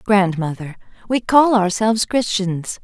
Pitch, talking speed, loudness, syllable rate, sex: 200 Hz, 105 wpm, -17 LUFS, 4.2 syllables/s, female